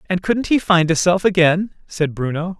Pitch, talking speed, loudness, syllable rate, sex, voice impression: 175 Hz, 210 wpm, -17 LUFS, 4.6 syllables/s, male, very masculine, very adult-like, thick, slightly tensed, slightly powerful, bright, soft, clear, fluent, cool, intellectual, very refreshing, sincere, calm, slightly mature, friendly, reassuring, slightly unique, slightly elegant, wild, slightly sweet, lively, kind, slightly modest